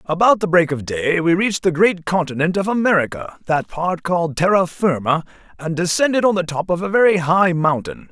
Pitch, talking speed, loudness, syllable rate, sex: 175 Hz, 200 wpm, -18 LUFS, 5.4 syllables/s, male